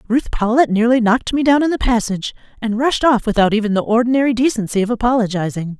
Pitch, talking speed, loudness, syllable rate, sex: 230 Hz, 195 wpm, -16 LUFS, 6.5 syllables/s, female